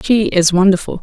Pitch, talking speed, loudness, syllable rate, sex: 195 Hz, 175 wpm, -13 LUFS, 5.4 syllables/s, female